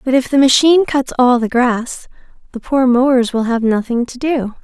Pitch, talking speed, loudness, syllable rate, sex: 255 Hz, 205 wpm, -14 LUFS, 5.0 syllables/s, female